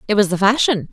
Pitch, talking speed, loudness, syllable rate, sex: 210 Hz, 260 wpm, -16 LUFS, 6.7 syllables/s, female